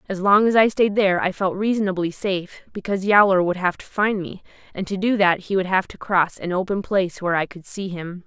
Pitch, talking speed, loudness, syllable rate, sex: 190 Hz, 245 wpm, -21 LUFS, 5.9 syllables/s, female